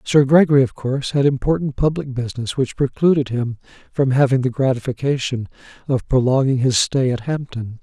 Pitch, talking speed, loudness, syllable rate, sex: 130 Hz, 160 wpm, -19 LUFS, 5.6 syllables/s, male